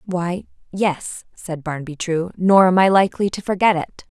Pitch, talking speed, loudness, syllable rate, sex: 180 Hz, 170 wpm, -19 LUFS, 4.8 syllables/s, female